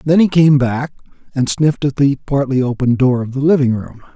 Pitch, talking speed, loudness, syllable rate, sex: 135 Hz, 215 wpm, -15 LUFS, 5.4 syllables/s, male